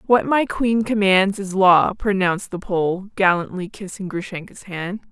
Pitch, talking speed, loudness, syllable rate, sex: 195 Hz, 150 wpm, -19 LUFS, 4.2 syllables/s, female